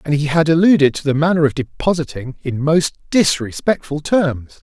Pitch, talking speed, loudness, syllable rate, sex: 155 Hz, 165 wpm, -17 LUFS, 5.1 syllables/s, male